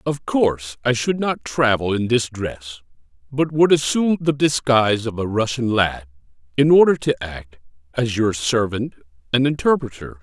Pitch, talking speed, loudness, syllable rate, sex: 120 Hz, 160 wpm, -19 LUFS, 4.7 syllables/s, male